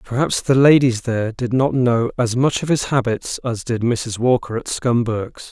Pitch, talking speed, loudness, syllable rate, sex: 120 Hz, 195 wpm, -18 LUFS, 4.5 syllables/s, male